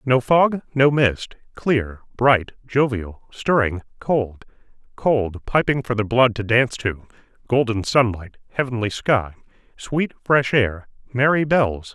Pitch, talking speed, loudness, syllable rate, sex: 120 Hz, 130 wpm, -20 LUFS, 3.9 syllables/s, male